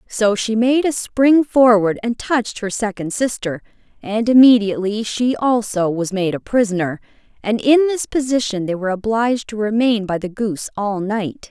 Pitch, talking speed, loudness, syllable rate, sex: 220 Hz, 170 wpm, -17 LUFS, 4.9 syllables/s, female